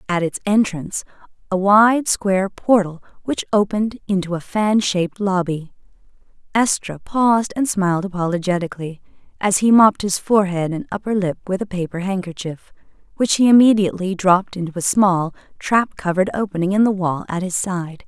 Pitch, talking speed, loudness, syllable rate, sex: 190 Hz, 150 wpm, -18 LUFS, 5.5 syllables/s, female